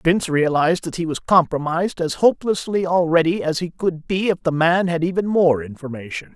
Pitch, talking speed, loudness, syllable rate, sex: 165 Hz, 190 wpm, -19 LUFS, 5.6 syllables/s, male